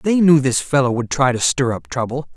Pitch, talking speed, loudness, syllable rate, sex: 130 Hz, 255 wpm, -17 LUFS, 5.3 syllables/s, male